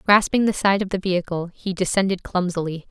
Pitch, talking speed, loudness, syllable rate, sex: 185 Hz, 185 wpm, -21 LUFS, 5.9 syllables/s, female